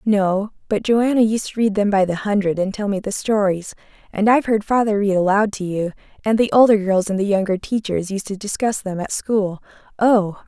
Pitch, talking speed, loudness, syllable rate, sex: 205 Hz, 210 wpm, -19 LUFS, 5.3 syllables/s, female